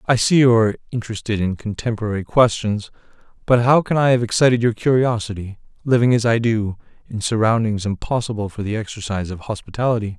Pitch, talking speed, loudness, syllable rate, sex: 110 Hz, 165 wpm, -19 LUFS, 6.3 syllables/s, male